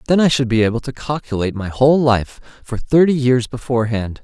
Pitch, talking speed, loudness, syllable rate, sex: 125 Hz, 200 wpm, -17 LUFS, 6.0 syllables/s, male